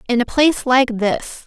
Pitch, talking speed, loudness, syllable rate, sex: 250 Hz, 205 wpm, -17 LUFS, 4.8 syllables/s, female